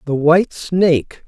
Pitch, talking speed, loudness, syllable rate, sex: 165 Hz, 140 wpm, -15 LUFS, 4.4 syllables/s, male